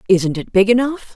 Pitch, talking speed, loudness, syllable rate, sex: 210 Hz, 210 wpm, -16 LUFS, 5.2 syllables/s, female